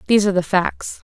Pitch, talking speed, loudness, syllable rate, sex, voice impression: 195 Hz, 215 wpm, -18 LUFS, 7.0 syllables/s, female, feminine, slightly young, tensed, slightly dark, clear, fluent, calm, slightly friendly, lively, kind, modest